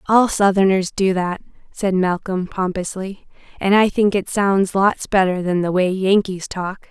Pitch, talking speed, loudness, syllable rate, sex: 190 Hz, 165 wpm, -18 LUFS, 4.3 syllables/s, female